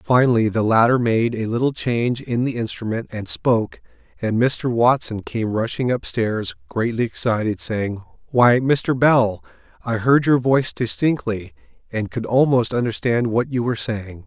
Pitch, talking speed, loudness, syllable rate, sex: 120 Hz, 155 wpm, -20 LUFS, 4.6 syllables/s, male